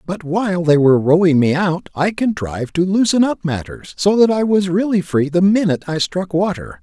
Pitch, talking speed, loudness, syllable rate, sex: 180 Hz, 210 wpm, -16 LUFS, 5.3 syllables/s, male